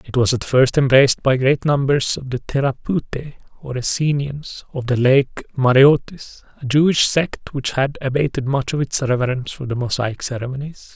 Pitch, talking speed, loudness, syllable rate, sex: 135 Hz, 170 wpm, -18 LUFS, 5.1 syllables/s, male